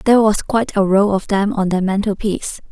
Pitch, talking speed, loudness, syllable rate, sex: 200 Hz, 245 wpm, -17 LUFS, 6.0 syllables/s, female